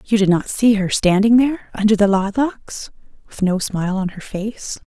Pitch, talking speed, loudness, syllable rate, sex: 205 Hz, 195 wpm, -17 LUFS, 4.9 syllables/s, female